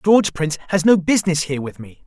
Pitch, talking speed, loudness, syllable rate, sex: 170 Hz, 230 wpm, -18 LUFS, 7.1 syllables/s, male